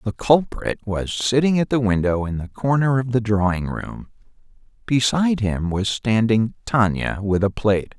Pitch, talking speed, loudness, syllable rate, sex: 115 Hz, 165 wpm, -20 LUFS, 4.6 syllables/s, male